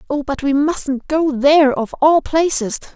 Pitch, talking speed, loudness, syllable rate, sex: 290 Hz, 185 wpm, -16 LUFS, 4.3 syllables/s, female